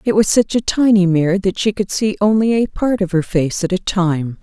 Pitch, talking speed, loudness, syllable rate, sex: 195 Hz, 255 wpm, -16 LUFS, 5.1 syllables/s, female